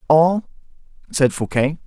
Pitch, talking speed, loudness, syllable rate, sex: 150 Hz, 95 wpm, -19 LUFS, 3.9 syllables/s, male